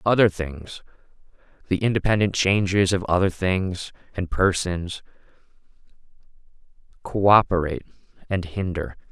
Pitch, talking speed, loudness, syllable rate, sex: 95 Hz, 85 wpm, -22 LUFS, 4.5 syllables/s, male